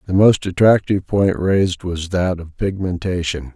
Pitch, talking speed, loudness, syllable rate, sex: 90 Hz, 150 wpm, -18 LUFS, 4.7 syllables/s, male